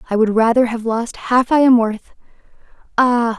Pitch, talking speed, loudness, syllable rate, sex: 235 Hz, 175 wpm, -16 LUFS, 4.7 syllables/s, female